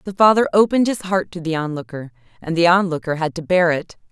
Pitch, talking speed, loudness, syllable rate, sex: 170 Hz, 205 wpm, -18 LUFS, 6.2 syllables/s, female